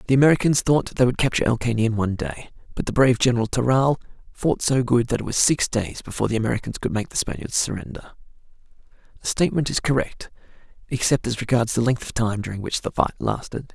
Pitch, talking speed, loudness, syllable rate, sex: 120 Hz, 210 wpm, -22 LUFS, 6.6 syllables/s, male